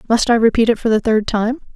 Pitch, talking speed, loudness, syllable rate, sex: 225 Hz, 275 wpm, -16 LUFS, 6.2 syllables/s, female